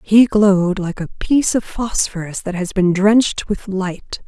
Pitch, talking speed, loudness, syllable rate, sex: 195 Hz, 180 wpm, -17 LUFS, 4.5 syllables/s, female